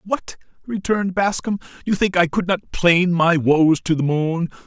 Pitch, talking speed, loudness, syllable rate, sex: 180 Hz, 180 wpm, -19 LUFS, 4.6 syllables/s, male